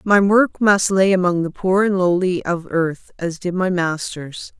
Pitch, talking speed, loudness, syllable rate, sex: 180 Hz, 195 wpm, -18 LUFS, 4.1 syllables/s, female